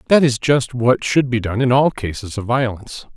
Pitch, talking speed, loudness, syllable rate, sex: 125 Hz, 230 wpm, -17 LUFS, 5.2 syllables/s, male